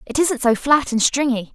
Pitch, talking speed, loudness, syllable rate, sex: 260 Hz, 235 wpm, -18 LUFS, 4.9 syllables/s, female